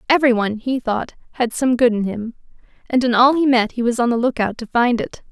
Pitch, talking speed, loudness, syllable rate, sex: 240 Hz, 235 wpm, -18 LUFS, 5.8 syllables/s, female